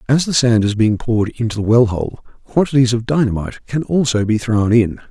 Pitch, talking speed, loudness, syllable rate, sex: 115 Hz, 210 wpm, -16 LUFS, 5.6 syllables/s, male